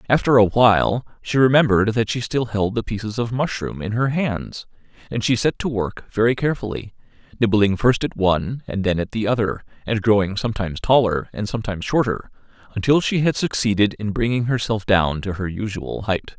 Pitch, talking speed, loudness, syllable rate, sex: 110 Hz, 185 wpm, -20 LUFS, 5.6 syllables/s, male